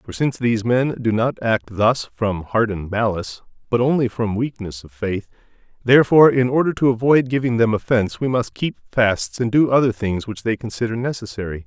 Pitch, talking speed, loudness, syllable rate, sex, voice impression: 115 Hz, 190 wpm, -19 LUFS, 5.6 syllables/s, male, very masculine, adult-like, slightly thick, cool, sincere, slightly wild, slightly kind